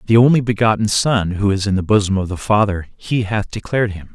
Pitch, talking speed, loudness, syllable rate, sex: 105 Hz, 230 wpm, -17 LUFS, 5.9 syllables/s, male